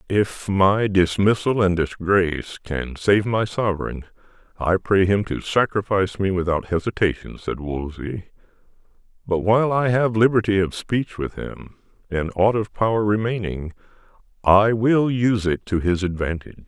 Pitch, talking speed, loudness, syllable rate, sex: 100 Hz, 145 wpm, -21 LUFS, 4.8 syllables/s, male